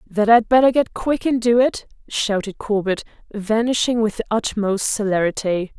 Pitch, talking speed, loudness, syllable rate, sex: 220 Hz, 155 wpm, -19 LUFS, 4.7 syllables/s, female